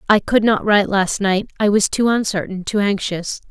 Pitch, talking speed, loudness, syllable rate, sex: 205 Hz, 190 wpm, -17 LUFS, 5.1 syllables/s, female